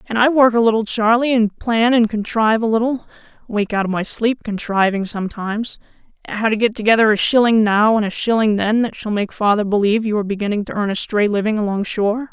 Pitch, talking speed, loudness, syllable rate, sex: 215 Hz, 220 wpm, -17 LUFS, 5.3 syllables/s, female